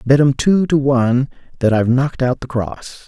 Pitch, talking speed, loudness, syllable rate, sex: 130 Hz, 215 wpm, -16 LUFS, 5.4 syllables/s, male